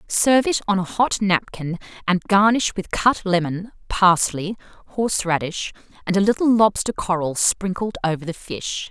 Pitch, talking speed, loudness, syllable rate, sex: 195 Hz, 150 wpm, -20 LUFS, 4.7 syllables/s, female